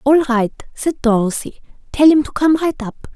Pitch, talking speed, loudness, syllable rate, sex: 270 Hz, 190 wpm, -16 LUFS, 4.7 syllables/s, female